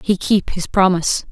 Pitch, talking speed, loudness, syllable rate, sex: 185 Hz, 185 wpm, -17 LUFS, 5.0 syllables/s, female